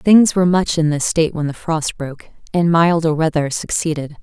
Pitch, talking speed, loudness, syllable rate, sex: 160 Hz, 200 wpm, -17 LUFS, 5.3 syllables/s, female